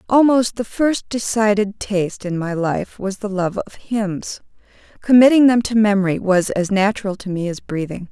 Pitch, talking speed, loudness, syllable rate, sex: 205 Hz, 180 wpm, -18 LUFS, 4.8 syllables/s, female